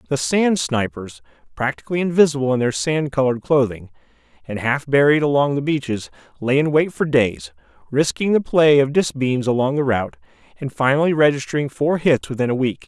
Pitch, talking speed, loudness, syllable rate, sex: 135 Hz, 175 wpm, -19 LUFS, 5.6 syllables/s, male